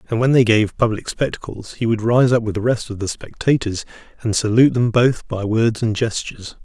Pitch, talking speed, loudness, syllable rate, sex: 115 Hz, 215 wpm, -18 LUFS, 5.5 syllables/s, male